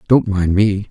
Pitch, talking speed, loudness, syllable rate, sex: 100 Hz, 200 wpm, -16 LUFS, 4.0 syllables/s, male